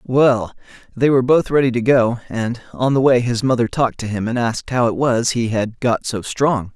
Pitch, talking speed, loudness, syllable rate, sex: 120 Hz, 230 wpm, -18 LUFS, 5.1 syllables/s, male